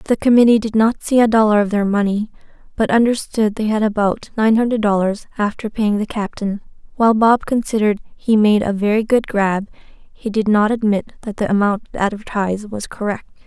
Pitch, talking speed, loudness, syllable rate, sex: 215 Hz, 185 wpm, -17 LUFS, 5.3 syllables/s, female